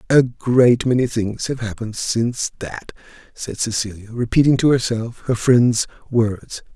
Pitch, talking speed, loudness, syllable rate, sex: 120 Hz, 140 wpm, -19 LUFS, 4.4 syllables/s, male